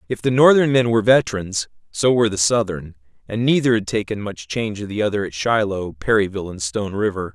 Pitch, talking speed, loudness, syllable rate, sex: 105 Hz, 205 wpm, -19 LUFS, 6.2 syllables/s, male